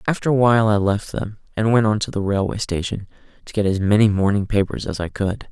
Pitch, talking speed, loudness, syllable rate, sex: 105 Hz, 240 wpm, -20 LUFS, 6.0 syllables/s, male